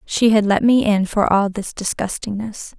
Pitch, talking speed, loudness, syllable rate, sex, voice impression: 210 Hz, 195 wpm, -18 LUFS, 4.6 syllables/s, female, feminine, slightly adult-like, sincere, calm, slightly elegant